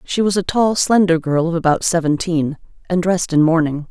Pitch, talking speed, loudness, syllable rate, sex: 170 Hz, 200 wpm, -17 LUFS, 5.4 syllables/s, female